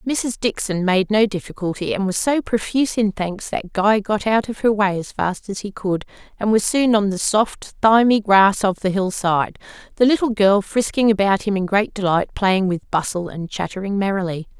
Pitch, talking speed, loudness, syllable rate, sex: 200 Hz, 205 wpm, -19 LUFS, 4.9 syllables/s, female